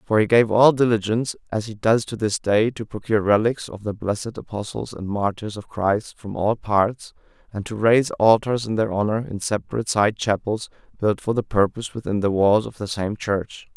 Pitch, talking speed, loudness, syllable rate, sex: 110 Hz, 205 wpm, -22 LUFS, 5.3 syllables/s, male